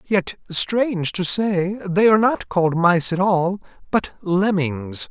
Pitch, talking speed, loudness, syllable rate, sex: 185 Hz, 155 wpm, -19 LUFS, 3.8 syllables/s, male